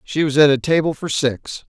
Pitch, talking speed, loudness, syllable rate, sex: 145 Hz, 240 wpm, -17 LUFS, 5.0 syllables/s, male